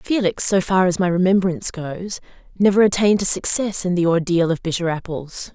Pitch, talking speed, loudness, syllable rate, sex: 185 Hz, 185 wpm, -18 LUFS, 5.5 syllables/s, female